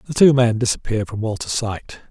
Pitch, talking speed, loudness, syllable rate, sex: 115 Hz, 200 wpm, -19 LUFS, 5.9 syllables/s, male